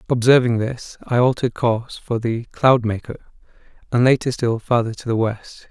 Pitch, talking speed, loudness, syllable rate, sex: 120 Hz, 160 wpm, -19 LUFS, 5.2 syllables/s, male